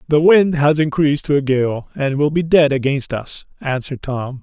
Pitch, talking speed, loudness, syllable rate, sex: 140 Hz, 205 wpm, -17 LUFS, 5.0 syllables/s, male